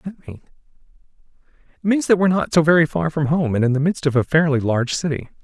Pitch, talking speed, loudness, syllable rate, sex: 155 Hz, 210 wpm, -18 LUFS, 7.2 syllables/s, male